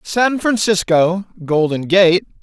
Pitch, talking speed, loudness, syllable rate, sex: 185 Hz, 100 wpm, -15 LUFS, 3.5 syllables/s, male